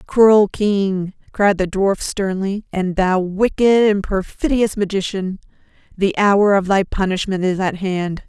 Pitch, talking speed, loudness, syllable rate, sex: 195 Hz, 145 wpm, -17 LUFS, 3.9 syllables/s, female